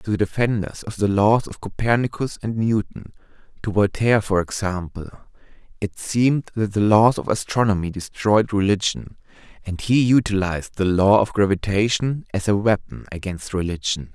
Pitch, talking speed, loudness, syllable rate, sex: 105 Hz, 150 wpm, -21 LUFS, 5.0 syllables/s, male